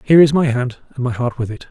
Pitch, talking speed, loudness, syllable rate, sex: 130 Hz, 315 wpm, -17 LUFS, 6.5 syllables/s, male